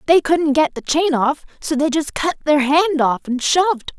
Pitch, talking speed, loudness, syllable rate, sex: 300 Hz, 225 wpm, -17 LUFS, 4.6 syllables/s, female